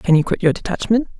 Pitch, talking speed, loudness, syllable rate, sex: 190 Hz, 250 wpm, -18 LUFS, 6.6 syllables/s, female